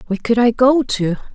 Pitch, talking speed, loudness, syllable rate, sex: 230 Hz, 225 wpm, -16 LUFS, 5.9 syllables/s, female